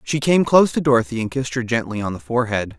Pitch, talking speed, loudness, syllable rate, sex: 125 Hz, 260 wpm, -19 LUFS, 7.1 syllables/s, male